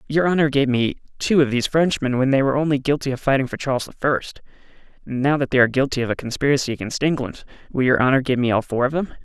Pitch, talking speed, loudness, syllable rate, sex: 135 Hz, 245 wpm, -20 LUFS, 6.8 syllables/s, male